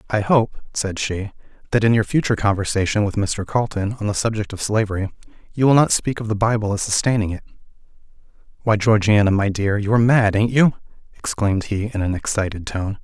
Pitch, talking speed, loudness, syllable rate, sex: 105 Hz, 195 wpm, -19 LUFS, 6.0 syllables/s, male